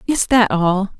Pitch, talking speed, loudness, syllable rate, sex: 210 Hz, 180 wpm, -16 LUFS, 3.9 syllables/s, female